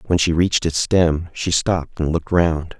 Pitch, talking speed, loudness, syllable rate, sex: 85 Hz, 215 wpm, -19 LUFS, 5.0 syllables/s, male